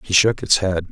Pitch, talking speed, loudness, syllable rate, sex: 95 Hz, 260 wpm, -17 LUFS, 5.1 syllables/s, male